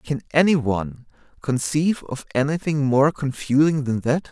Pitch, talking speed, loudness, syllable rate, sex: 140 Hz, 140 wpm, -21 LUFS, 4.9 syllables/s, male